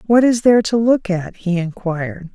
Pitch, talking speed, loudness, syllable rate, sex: 200 Hz, 205 wpm, -17 LUFS, 5.1 syllables/s, female